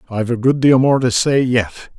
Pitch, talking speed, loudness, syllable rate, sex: 125 Hz, 240 wpm, -15 LUFS, 5.2 syllables/s, male